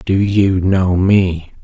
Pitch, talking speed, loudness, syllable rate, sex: 95 Hz, 145 wpm, -14 LUFS, 2.6 syllables/s, male